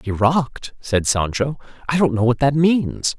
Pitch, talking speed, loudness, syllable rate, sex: 130 Hz, 170 wpm, -19 LUFS, 3.9 syllables/s, male